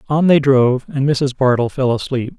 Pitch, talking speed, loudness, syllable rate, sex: 135 Hz, 200 wpm, -16 LUFS, 5.3 syllables/s, male